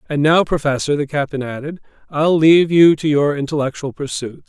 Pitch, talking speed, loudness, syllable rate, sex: 150 Hz, 175 wpm, -16 LUFS, 5.5 syllables/s, male